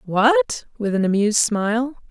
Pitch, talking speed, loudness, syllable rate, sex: 230 Hz, 140 wpm, -19 LUFS, 4.7 syllables/s, female